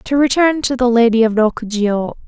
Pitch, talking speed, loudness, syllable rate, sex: 240 Hz, 185 wpm, -15 LUFS, 4.6 syllables/s, female